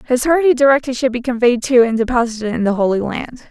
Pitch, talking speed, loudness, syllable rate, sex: 245 Hz, 240 wpm, -15 LUFS, 6.3 syllables/s, female